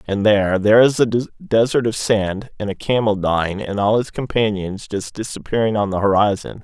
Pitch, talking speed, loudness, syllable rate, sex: 105 Hz, 190 wpm, -18 LUFS, 5.3 syllables/s, male